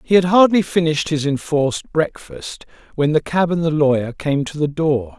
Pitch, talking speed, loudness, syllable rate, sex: 155 Hz, 195 wpm, -18 LUFS, 5.0 syllables/s, male